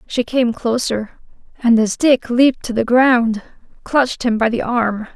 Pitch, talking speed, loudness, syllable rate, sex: 235 Hz, 175 wpm, -16 LUFS, 4.3 syllables/s, female